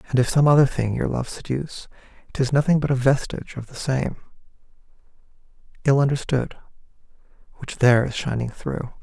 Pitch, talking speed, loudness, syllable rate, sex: 135 Hz, 155 wpm, -22 LUFS, 5.7 syllables/s, male